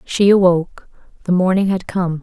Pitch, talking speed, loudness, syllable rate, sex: 185 Hz, 160 wpm, -16 LUFS, 5.1 syllables/s, female